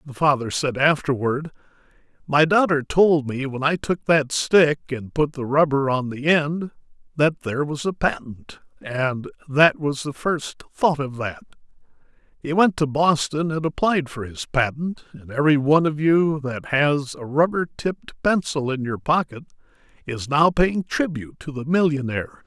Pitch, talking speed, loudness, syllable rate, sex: 150 Hz, 170 wpm, -21 LUFS, 4.6 syllables/s, male